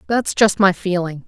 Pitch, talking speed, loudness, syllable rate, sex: 190 Hz, 190 wpm, -17 LUFS, 4.6 syllables/s, female